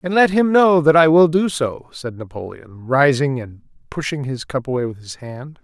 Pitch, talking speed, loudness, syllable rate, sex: 140 Hz, 215 wpm, -17 LUFS, 4.8 syllables/s, male